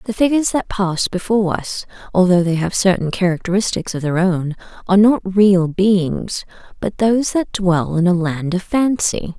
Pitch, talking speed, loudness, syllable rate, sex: 190 Hz, 175 wpm, -17 LUFS, 4.8 syllables/s, female